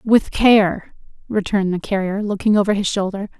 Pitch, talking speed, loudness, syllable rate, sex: 200 Hz, 160 wpm, -18 LUFS, 5.1 syllables/s, female